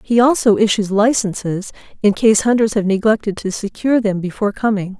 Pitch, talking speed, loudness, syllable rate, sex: 210 Hz, 170 wpm, -16 LUFS, 5.6 syllables/s, female